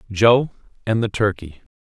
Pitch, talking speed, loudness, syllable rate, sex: 105 Hz, 130 wpm, -19 LUFS, 4.6 syllables/s, male